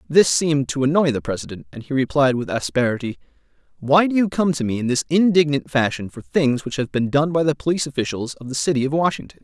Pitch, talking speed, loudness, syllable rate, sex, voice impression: 145 Hz, 230 wpm, -20 LUFS, 6.3 syllables/s, male, very masculine, middle-aged, very thick, very tensed, very powerful, bright, hard, very clear, very fluent, slightly raspy, very cool, very intellectual, refreshing, sincere, slightly calm, mature, very friendly, very reassuring, very unique, slightly elegant, wild, slightly sweet, very lively, kind, intense